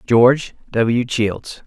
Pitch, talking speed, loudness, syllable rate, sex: 120 Hz, 110 wpm, -17 LUFS, 2.9 syllables/s, male